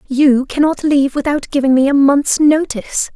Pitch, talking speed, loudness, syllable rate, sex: 280 Hz, 190 wpm, -14 LUFS, 5.0 syllables/s, female